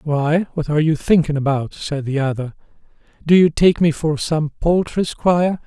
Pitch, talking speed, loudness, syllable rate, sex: 155 Hz, 180 wpm, -18 LUFS, 4.9 syllables/s, male